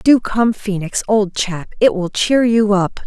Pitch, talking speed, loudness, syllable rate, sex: 210 Hz, 195 wpm, -16 LUFS, 4.0 syllables/s, female